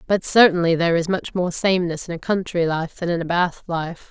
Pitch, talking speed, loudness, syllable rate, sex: 175 Hz, 235 wpm, -20 LUFS, 5.6 syllables/s, female